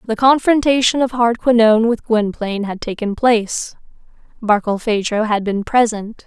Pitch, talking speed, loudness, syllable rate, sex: 225 Hz, 125 wpm, -16 LUFS, 5.0 syllables/s, female